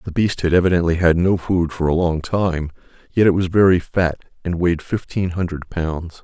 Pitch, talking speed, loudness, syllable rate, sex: 85 Hz, 200 wpm, -19 LUFS, 5.0 syllables/s, male